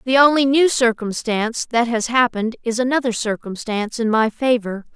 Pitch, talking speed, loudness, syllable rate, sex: 235 Hz, 160 wpm, -18 LUFS, 5.3 syllables/s, female